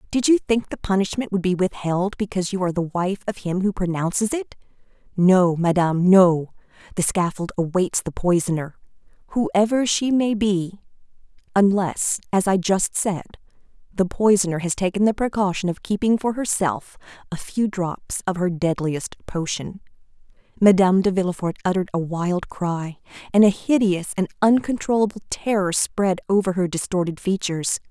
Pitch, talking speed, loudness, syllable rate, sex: 190 Hz, 150 wpm, -21 LUFS, 5.1 syllables/s, female